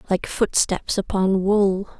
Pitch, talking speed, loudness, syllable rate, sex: 195 Hz, 120 wpm, -21 LUFS, 3.5 syllables/s, female